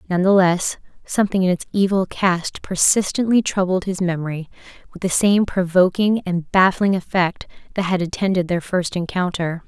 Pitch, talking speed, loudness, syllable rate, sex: 185 Hz, 155 wpm, -19 LUFS, 5.0 syllables/s, female